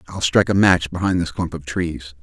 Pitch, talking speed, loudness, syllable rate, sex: 85 Hz, 245 wpm, -19 LUFS, 5.8 syllables/s, male